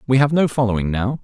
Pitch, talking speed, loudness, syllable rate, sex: 125 Hz, 195 wpm, -18 LUFS, 6.6 syllables/s, male